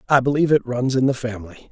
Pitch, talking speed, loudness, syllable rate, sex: 125 Hz, 245 wpm, -20 LUFS, 7.2 syllables/s, male